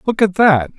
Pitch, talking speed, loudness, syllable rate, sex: 185 Hz, 230 wpm, -14 LUFS, 4.8 syllables/s, male